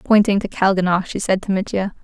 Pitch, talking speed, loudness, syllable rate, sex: 195 Hz, 205 wpm, -18 LUFS, 5.8 syllables/s, female